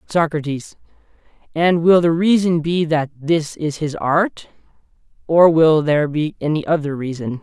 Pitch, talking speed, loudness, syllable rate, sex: 160 Hz, 145 wpm, -17 LUFS, 4.4 syllables/s, male